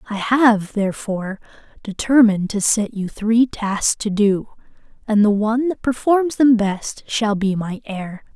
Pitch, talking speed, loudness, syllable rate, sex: 215 Hz, 160 wpm, -18 LUFS, 4.3 syllables/s, female